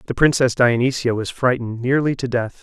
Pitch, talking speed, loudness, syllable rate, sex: 125 Hz, 185 wpm, -19 LUFS, 5.7 syllables/s, male